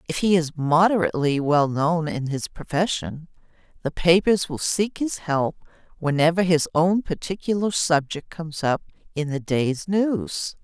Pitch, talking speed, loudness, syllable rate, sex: 165 Hz, 140 wpm, -22 LUFS, 4.5 syllables/s, female